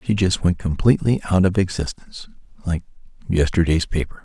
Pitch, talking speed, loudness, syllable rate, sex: 90 Hz, 140 wpm, -20 LUFS, 6.0 syllables/s, male